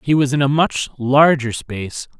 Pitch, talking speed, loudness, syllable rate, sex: 135 Hz, 190 wpm, -17 LUFS, 4.7 syllables/s, male